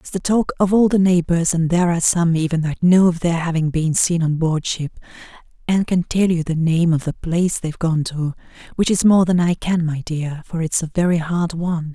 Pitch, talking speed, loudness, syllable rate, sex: 170 Hz, 240 wpm, -18 LUFS, 5.4 syllables/s, male